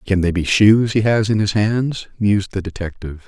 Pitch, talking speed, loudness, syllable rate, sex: 100 Hz, 220 wpm, -17 LUFS, 5.4 syllables/s, male